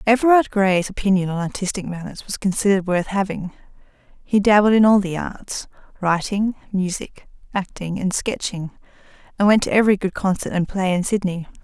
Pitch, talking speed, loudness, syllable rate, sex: 195 Hz, 155 wpm, -20 LUFS, 5.4 syllables/s, female